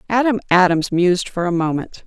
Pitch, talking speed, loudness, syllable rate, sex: 185 Hz, 175 wpm, -17 LUFS, 5.6 syllables/s, female